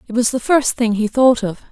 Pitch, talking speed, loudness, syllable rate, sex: 235 Hz, 280 wpm, -16 LUFS, 5.3 syllables/s, female